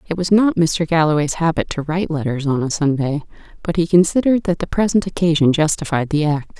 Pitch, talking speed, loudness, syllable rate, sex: 165 Hz, 200 wpm, -17 LUFS, 6.0 syllables/s, female